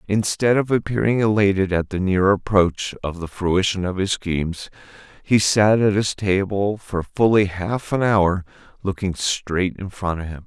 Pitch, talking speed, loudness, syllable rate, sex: 95 Hz, 170 wpm, -20 LUFS, 4.4 syllables/s, male